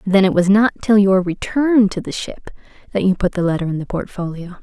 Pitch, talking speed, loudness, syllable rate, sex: 195 Hz, 235 wpm, -17 LUFS, 5.6 syllables/s, female